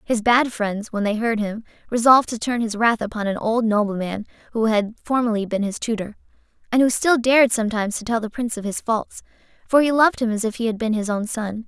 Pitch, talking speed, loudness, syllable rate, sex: 225 Hz, 235 wpm, -21 LUFS, 6.0 syllables/s, female